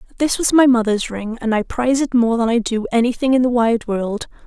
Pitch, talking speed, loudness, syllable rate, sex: 240 Hz, 240 wpm, -17 LUFS, 5.8 syllables/s, female